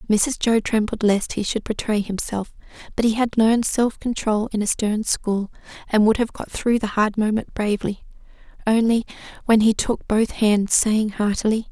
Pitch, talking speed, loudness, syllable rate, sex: 215 Hz, 180 wpm, -21 LUFS, 4.8 syllables/s, female